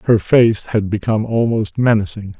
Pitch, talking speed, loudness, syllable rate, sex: 105 Hz, 150 wpm, -16 LUFS, 4.7 syllables/s, male